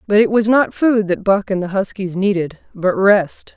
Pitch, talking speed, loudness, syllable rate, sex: 195 Hz, 220 wpm, -16 LUFS, 4.6 syllables/s, female